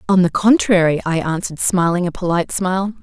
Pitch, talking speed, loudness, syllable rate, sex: 180 Hz, 180 wpm, -17 LUFS, 6.2 syllables/s, female